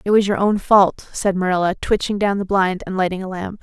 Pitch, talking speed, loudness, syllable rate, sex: 195 Hz, 250 wpm, -18 LUFS, 5.5 syllables/s, female